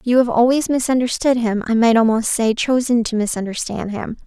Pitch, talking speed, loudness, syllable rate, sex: 235 Hz, 185 wpm, -17 LUFS, 5.4 syllables/s, female